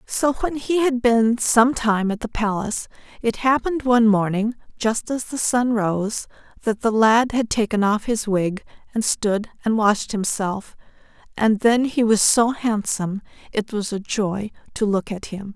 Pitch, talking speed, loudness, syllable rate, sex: 220 Hz, 175 wpm, -21 LUFS, 4.3 syllables/s, female